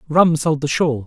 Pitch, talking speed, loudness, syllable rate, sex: 150 Hz, 225 wpm, -17 LUFS, 4.5 syllables/s, male